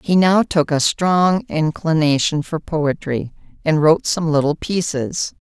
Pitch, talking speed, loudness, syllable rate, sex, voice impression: 160 Hz, 140 wpm, -18 LUFS, 4.0 syllables/s, female, feminine, very adult-like, slightly powerful, clear, slightly sincere, friendly, reassuring, slightly elegant